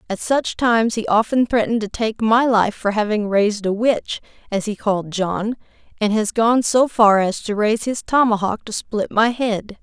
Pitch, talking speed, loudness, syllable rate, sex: 220 Hz, 200 wpm, -19 LUFS, 4.6 syllables/s, female